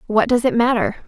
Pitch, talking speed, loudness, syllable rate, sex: 235 Hz, 225 wpm, -17 LUFS, 6.0 syllables/s, female